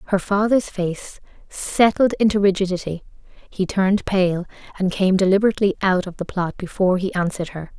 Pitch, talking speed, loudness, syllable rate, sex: 190 Hz, 155 wpm, -20 LUFS, 5.6 syllables/s, female